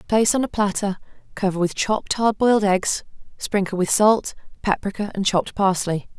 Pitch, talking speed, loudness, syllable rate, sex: 200 Hz, 165 wpm, -21 LUFS, 5.4 syllables/s, female